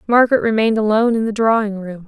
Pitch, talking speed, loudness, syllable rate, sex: 220 Hz, 200 wpm, -16 LUFS, 7.3 syllables/s, female